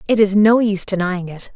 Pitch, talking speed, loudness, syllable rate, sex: 200 Hz, 230 wpm, -16 LUFS, 5.8 syllables/s, female